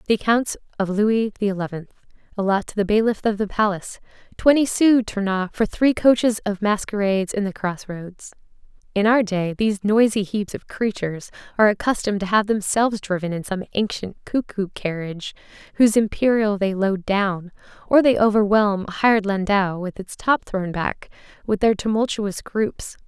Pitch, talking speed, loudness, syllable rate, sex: 205 Hz, 165 wpm, -21 LUFS, 5.3 syllables/s, female